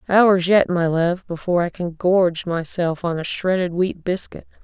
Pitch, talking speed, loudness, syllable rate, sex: 180 Hz, 180 wpm, -20 LUFS, 4.6 syllables/s, female